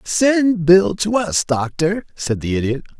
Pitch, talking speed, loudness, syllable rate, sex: 170 Hz, 160 wpm, -17 LUFS, 3.8 syllables/s, male